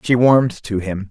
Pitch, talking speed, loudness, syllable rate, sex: 110 Hz, 215 wpm, -16 LUFS, 5.0 syllables/s, male